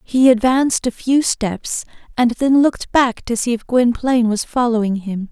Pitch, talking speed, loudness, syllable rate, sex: 240 Hz, 180 wpm, -17 LUFS, 4.7 syllables/s, female